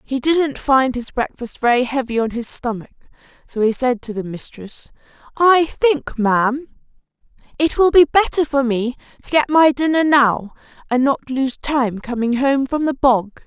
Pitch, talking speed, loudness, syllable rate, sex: 260 Hz, 175 wpm, -17 LUFS, 4.4 syllables/s, female